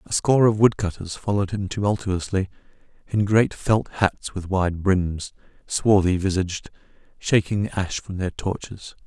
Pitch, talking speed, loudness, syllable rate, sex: 95 Hz, 130 wpm, -23 LUFS, 4.7 syllables/s, male